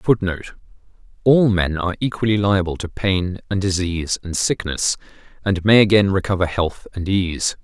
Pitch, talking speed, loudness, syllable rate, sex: 95 Hz, 150 wpm, -19 LUFS, 5.1 syllables/s, male